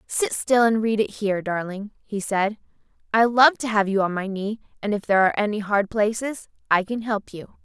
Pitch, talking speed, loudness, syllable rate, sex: 210 Hz, 220 wpm, -22 LUFS, 5.3 syllables/s, female